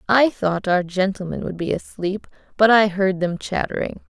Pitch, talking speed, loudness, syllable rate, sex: 195 Hz, 175 wpm, -20 LUFS, 4.8 syllables/s, female